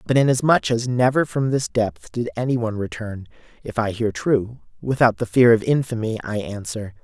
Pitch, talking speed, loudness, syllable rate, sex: 120 Hz, 190 wpm, -21 LUFS, 5.2 syllables/s, male